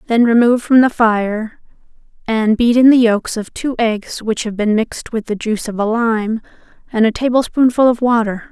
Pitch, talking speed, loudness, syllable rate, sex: 230 Hz, 195 wpm, -15 LUFS, 5.0 syllables/s, female